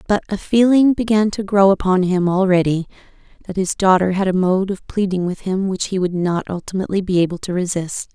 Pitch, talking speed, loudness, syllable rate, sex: 190 Hz, 205 wpm, -18 LUFS, 5.7 syllables/s, female